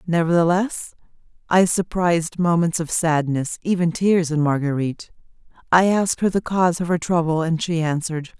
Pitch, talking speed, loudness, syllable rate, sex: 170 Hz, 150 wpm, -20 LUFS, 5.3 syllables/s, female